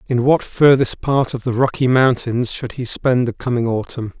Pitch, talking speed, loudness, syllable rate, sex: 125 Hz, 200 wpm, -17 LUFS, 4.7 syllables/s, male